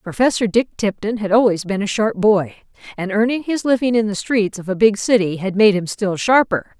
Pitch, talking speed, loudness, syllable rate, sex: 210 Hz, 220 wpm, -17 LUFS, 5.1 syllables/s, female